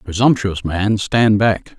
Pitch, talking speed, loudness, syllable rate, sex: 105 Hz, 135 wpm, -16 LUFS, 3.6 syllables/s, male